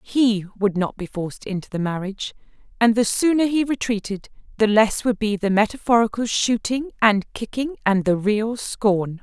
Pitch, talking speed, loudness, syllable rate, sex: 215 Hz, 165 wpm, -21 LUFS, 4.9 syllables/s, female